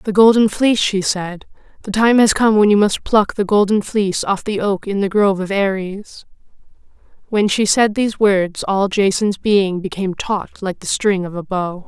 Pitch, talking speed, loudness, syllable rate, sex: 200 Hz, 200 wpm, -16 LUFS, 4.9 syllables/s, female